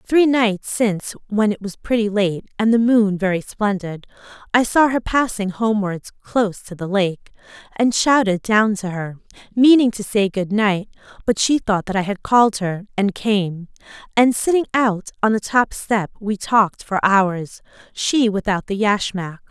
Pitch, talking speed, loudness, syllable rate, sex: 210 Hz, 175 wpm, -19 LUFS, 4.5 syllables/s, female